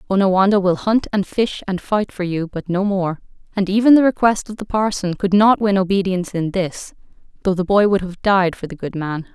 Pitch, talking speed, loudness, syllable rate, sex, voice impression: 190 Hz, 225 wpm, -18 LUFS, 5.4 syllables/s, female, very feminine, young, slightly adult-like, very thin, tensed, slightly weak, bright, slightly soft, clear, fluent, slightly raspy, cute, very intellectual, refreshing, slightly sincere, slightly calm, friendly, unique, elegant, slightly wild, sweet, kind, slightly modest